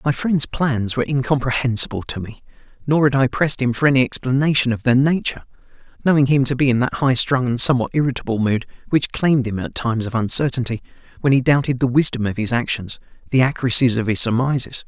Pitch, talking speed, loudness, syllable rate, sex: 130 Hz, 200 wpm, -19 LUFS, 6.4 syllables/s, male